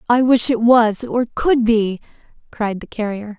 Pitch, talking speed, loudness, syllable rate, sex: 230 Hz, 175 wpm, -17 LUFS, 4.2 syllables/s, female